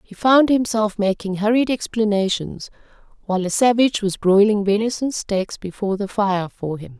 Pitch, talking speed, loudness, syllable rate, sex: 210 Hz, 155 wpm, -19 LUFS, 5.1 syllables/s, female